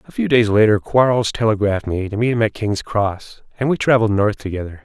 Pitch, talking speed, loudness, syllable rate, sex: 110 Hz, 225 wpm, -17 LUFS, 6.0 syllables/s, male